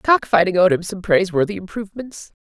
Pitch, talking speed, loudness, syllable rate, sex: 195 Hz, 150 wpm, -18 LUFS, 6.1 syllables/s, female